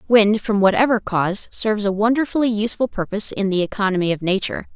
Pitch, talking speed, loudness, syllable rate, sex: 210 Hz, 175 wpm, -19 LUFS, 6.7 syllables/s, female